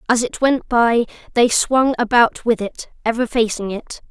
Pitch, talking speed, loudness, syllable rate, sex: 235 Hz, 175 wpm, -18 LUFS, 4.5 syllables/s, female